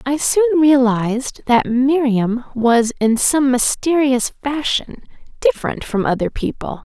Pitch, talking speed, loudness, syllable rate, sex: 260 Hz, 120 wpm, -17 LUFS, 4.0 syllables/s, female